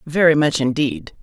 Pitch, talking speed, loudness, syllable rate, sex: 145 Hz, 145 wpm, -17 LUFS, 4.6 syllables/s, female